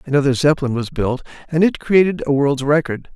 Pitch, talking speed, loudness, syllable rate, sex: 145 Hz, 190 wpm, -17 LUFS, 5.9 syllables/s, male